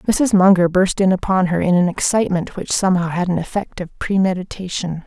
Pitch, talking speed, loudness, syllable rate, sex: 185 Hz, 190 wpm, -17 LUFS, 5.6 syllables/s, female